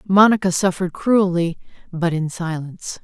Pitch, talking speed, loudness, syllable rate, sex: 180 Hz, 120 wpm, -19 LUFS, 5.1 syllables/s, female